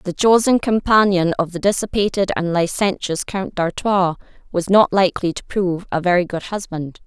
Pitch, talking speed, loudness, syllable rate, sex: 185 Hz, 160 wpm, -18 LUFS, 5.1 syllables/s, female